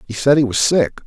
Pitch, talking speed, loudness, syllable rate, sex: 125 Hz, 285 wpm, -15 LUFS, 6.3 syllables/s, male